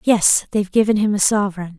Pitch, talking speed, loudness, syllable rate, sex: 200 Hz, 200 wpm, -17 LUFS, 6.2 syllables/s, female